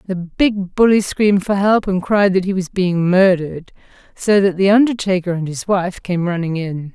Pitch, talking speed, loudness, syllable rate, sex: 185 Hz, 200 wpm, -16 LUFS, 4.9 syllables/s, female